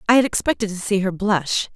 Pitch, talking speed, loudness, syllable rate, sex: 200 Hz, 240 wpm, -20 LUFS, 5.8 syllables/s, female